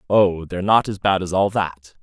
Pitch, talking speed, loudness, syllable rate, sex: 95 Hz, 235 wpm, -19 LUFS, 5.0 syllables/s, male